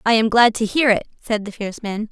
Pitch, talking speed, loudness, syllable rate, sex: 220 Hz, 285 wpm, -18 LUFS, 6.1 syllables/s, female